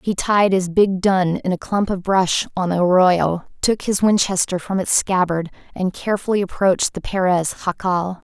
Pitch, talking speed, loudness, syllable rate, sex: 185 Hz, 180 wpm, -19 LUFS, 4.7 syllables/s, female